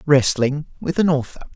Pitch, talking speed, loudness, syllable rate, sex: 145 Hz, 155 wpm, -19 LUFS, 5.0 syllables/s, male